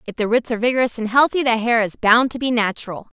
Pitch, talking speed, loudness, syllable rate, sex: 230 Hz, 265 wpm, -18 LUFS, 6.7 syllables/s, female